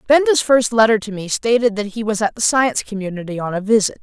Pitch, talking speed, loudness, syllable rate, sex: 220 Hz, 240 wpm, -17 LUFS, 6.2 syllables/s, female